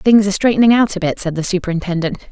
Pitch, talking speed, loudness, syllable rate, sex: 190 Hz, 235 wpm, -15 LUFS, 7.4 syllables/s, female